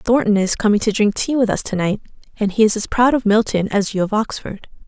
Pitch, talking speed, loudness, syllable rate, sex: 210 Hz, 260 wpm, -17 LUFS, 5.8 syllables/s, female